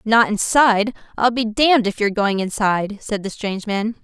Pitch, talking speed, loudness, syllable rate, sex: 215 Hz, 180 wpm, -18 LUFS, 5.5 syllables/s, female